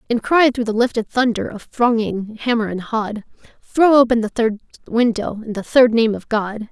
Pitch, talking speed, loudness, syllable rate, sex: 230 Hz, 195 wpm, -18 LUFS, 4.8 syllables/s, female